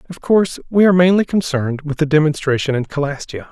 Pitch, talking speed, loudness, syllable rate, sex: 155 Hz, 190 wpm, -16 LUFS, 6.6 syllables/s, male